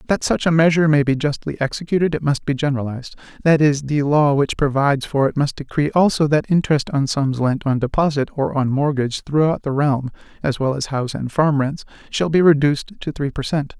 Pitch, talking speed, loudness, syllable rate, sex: 145 Hz, 215 wpm, -19 LUFS, 5.8 syllables/s, male